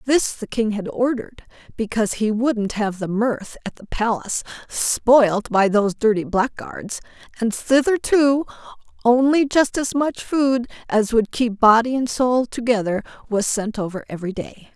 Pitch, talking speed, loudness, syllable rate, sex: 230 Hz, 155 wpm, -20 LUFS, 4.5 syllables/s, female